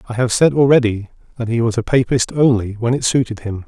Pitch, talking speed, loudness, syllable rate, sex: 120 Hz, 230 wpm, -16 LUFS, 5.9 syllables/s, male